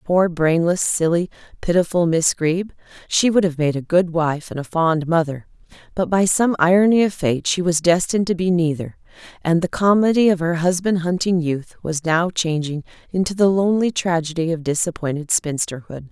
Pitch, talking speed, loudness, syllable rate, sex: 170 Hz, 175 wpm, -19 LUFS, 5.1 syllables/s, female